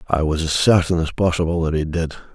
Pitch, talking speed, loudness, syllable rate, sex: 80 Hz, 230 wpm, -19 LUFS, 6.1 syllables/s, male